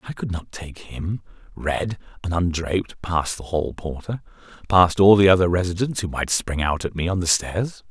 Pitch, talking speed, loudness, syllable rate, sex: 90 Hz, 195 wpm, -22 LUFS, 4.8 syllables/s, male